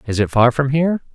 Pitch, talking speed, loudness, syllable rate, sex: 135 Hz, 260 wpm, -16 LUFS, 6.5 syllables/s, male